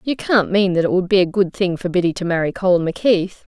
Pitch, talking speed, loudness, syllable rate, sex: 185 Hz, 270 wpm, -18 LUFS, 6.4 syllables/s, female